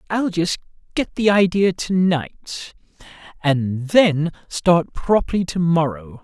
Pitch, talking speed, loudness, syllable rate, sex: 170 Hz, 125 wpm, -19 LUFS, 3.5 syllables/s, male